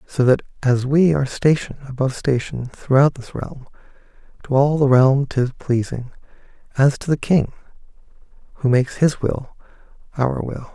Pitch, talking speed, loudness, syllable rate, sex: 135 Hz, 150 wpm, -19 LUFS, 4.9 syllables/s, male